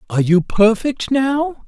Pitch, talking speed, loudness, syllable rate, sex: 235 Hz, 145 wpm, -16 LUFS, 4.0 syllables/s, male